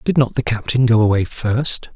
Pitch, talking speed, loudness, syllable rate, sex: 120 Hz, 215 wpm, -17 LUFS, 5.0 syllables/s, male